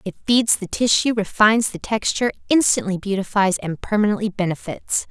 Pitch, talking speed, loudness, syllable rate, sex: 205 Hz, 140 wpm, -19 LUFS, 5.5 syllables/s, female